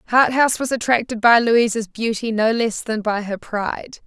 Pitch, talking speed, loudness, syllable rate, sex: 230 Hz, 175 wpm, -19 LUFS, 5.0 syllables/s, female